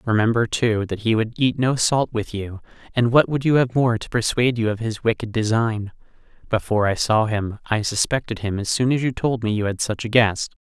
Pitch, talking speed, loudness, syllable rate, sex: 115 Hz, 230 wpm, -21 LUFS, 5.4 syllables/s, male